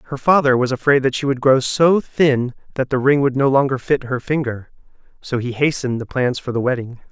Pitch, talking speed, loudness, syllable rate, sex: 130 Hz, 230 wpm, -18 LUFS, 5.6 syllables/s, male